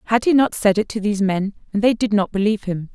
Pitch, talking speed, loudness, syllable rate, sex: 210 Hz, 285 wpm, -19 LUFS, 6.7 syllables/s, female